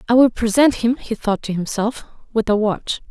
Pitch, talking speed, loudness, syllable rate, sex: 225 Hz, 210 wpm, -19 LUFS, 5.0 syllables/s, female